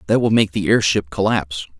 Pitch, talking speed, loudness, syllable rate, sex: 100 Hz, 200 wpm, -18 LUFS, 6.0 syllables/s, male